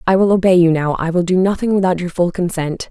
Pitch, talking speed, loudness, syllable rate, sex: 180 Hz, 270 wpm, -15 LUFS, 6.2 syllables/s, female